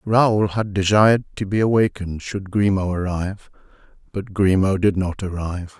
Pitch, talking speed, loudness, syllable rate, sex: 100 Hz, 145 wpm, -20 LUFS, 5.1 syllables/s, male